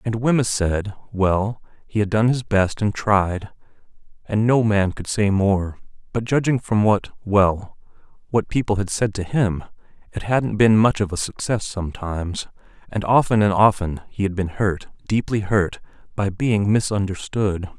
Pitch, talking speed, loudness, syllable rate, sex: 105 Hz, 160 wpm, -21 LUFS, 4.4 syllables/s, male